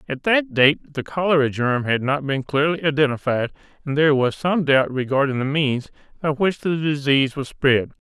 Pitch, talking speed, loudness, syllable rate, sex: 145 Hz, 185 wpm, -20 LUFS, 5.1 syllables/s, male